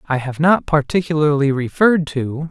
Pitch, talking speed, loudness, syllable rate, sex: 150 Hz, 145 wpm, -17 LUFS, 5.2 syllables/s, male